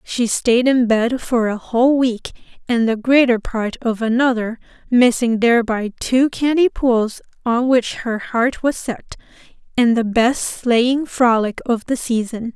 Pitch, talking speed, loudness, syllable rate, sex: 240 Hz, 160 wpm, -17 LUFS, 4.1 syllables/s, female